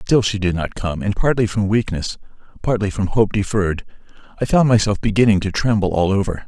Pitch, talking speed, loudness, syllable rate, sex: 100 Hz, 195 wpm, -19 LUFS, 5.8 syllables/s, male